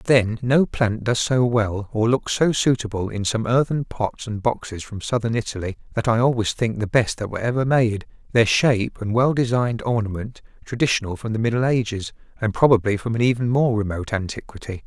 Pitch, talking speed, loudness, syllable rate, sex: 115 Hz, 195 wpm, -21 LUFS, 5.5 syllables/s, male